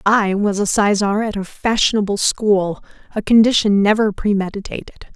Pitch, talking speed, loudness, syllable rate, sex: 205 Hz, 140 wpm, -17 LUFS, 5.1 syllables/s, female